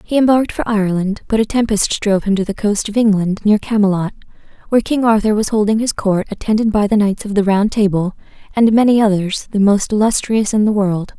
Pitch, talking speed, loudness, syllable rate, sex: 210 Hz, 215 wpm, -15 LUFS, 5.9 syllables/s, female